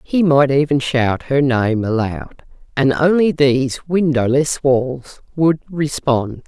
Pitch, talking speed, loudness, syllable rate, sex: 135 Hz, 130 wpm, -16 LUFS, 3.6 syllables/s, female